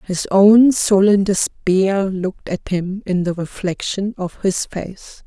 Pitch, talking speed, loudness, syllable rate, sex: 190 Hz, 150 wpm, -17 LUFS, 3.6 syllables/s, female